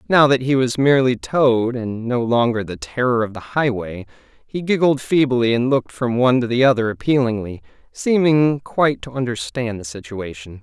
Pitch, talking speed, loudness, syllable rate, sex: 120 Hz, 175 wpm, -18 LUFS, 5.1 syllables/s, male